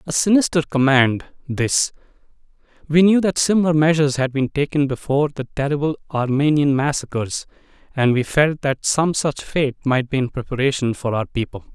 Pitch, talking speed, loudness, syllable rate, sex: 145 Hz, 160 wpm, -19 LUFS, 5.3 syllables/s, male